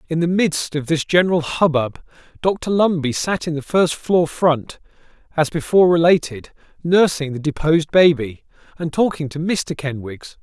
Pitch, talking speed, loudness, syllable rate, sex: 160 Hz, 155 wpm, -18 LUFS, 4.7 syllables/s, male